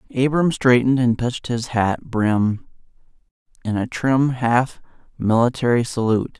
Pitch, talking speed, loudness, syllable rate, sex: 120 Hz, 120 wpm, -19 LUFS, 4.7 syllables/s, male